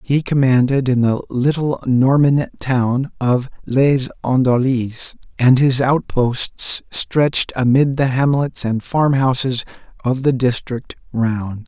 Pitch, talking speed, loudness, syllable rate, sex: 130 Hz, 120 wpm, -17 LUFS, 3.6 syllables/s, male